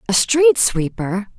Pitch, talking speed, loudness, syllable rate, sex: 195 Hz, 130 wpm, -16 LUFS, 3.5 syllables/s, female